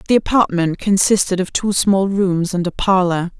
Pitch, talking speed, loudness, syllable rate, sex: 190 Hz, 175 wpm, -16 LUFS, 4.7 syllables/s, female